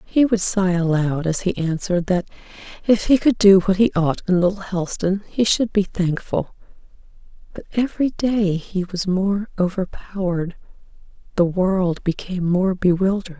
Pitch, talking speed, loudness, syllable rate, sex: 190 Hz, 150 wpm, -20 LUFS, 4.9 syllables/s, female